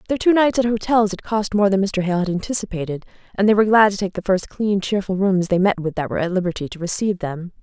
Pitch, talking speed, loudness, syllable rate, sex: 195 Hz, 265 wpm, -19 LUFS, 6.5 syllables/s, female